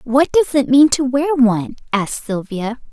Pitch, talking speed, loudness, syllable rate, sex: 255 Hz, 185 wpm, -16 LUFS, 4.7 syllables/s, female